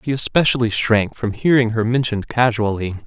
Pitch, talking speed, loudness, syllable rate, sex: 115 Hz, 155 wpm, -18 LUFS, 5.5 syllables/s, male